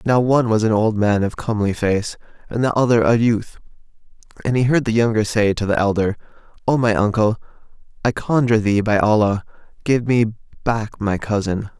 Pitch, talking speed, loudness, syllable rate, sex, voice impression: 110 Hz, 185 wpm, -18 LUFS, 5.3 syllables/s, male, masculine, adult-like, slightly dark, soft, clear, fluent, cool, refreshing, sincere, calm, friendly, reassuring, slightly wild, slightly kind, slightly modest